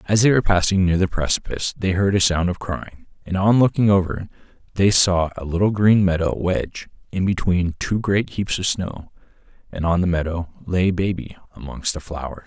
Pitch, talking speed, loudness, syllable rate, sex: 90 Hz, 195 wpm, -20 LUFS, 5.3 syllables/s, male